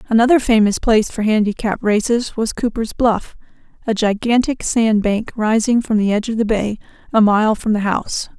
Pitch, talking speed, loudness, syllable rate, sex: 220 Hz, 180 wpm, -17 LUFS, 5.2 syllables/s, female